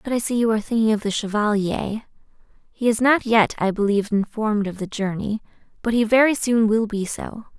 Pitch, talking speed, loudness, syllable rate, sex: 220 Hz, 205 wpm, -21 LUFS, 5.7 syllables/s, female